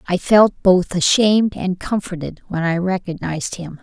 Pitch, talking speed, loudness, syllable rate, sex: 185 Hz, 155 wpm, -18 LUFS, 4.9 syllables/s, female